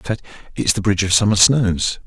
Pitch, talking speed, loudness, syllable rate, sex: 105 Hz, 230 wpm, -16 LUFS, 6.3 syllables/s, male